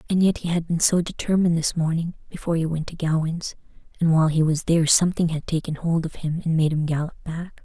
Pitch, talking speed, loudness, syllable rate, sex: 165 Hz, 235 wpm, -22 LUFS, 6.6 syllables/s, female